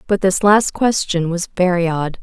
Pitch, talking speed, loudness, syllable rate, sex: 185 Hz, 190 wpm, -16 LUFS, 4.5 syllables/s, female